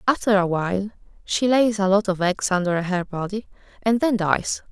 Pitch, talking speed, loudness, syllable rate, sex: 200 Hz, 190 wpm, -21 LUFS, 4.9 syllables/s, female